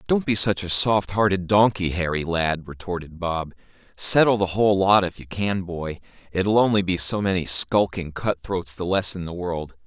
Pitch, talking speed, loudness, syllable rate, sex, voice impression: 90 Hz, 195 wpm, -22 LUFS, 4.8 syllables/s, male, very masculine, adult-like, slightly middle-aged, slightly thick, tensed, powerful, bright, slightly soft, clear, fluent, cool, intellectual, very refreshing, sincere, slightly calm, slightly mature, very friendly, reassuring, very unique, very wild, slightly sweet, lively, kind, intense